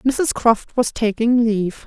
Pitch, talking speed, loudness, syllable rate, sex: 230 Hz, 160 wpm, -18 LUFS, 3.8 syllables/s, female